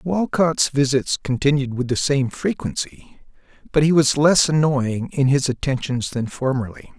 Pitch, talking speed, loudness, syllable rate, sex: 135 Hz, 145 wpm, -20 LUFS, 4.5 syllables/s, male